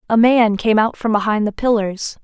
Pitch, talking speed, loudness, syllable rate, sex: 220 Hz, 215 wpm, -16 LUFS, 5.0 syllables/s, female